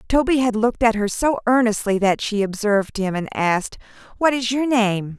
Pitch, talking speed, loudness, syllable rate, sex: 225 Hz, 195 wpm, -20 LUFS, 5.3 syllables/s, female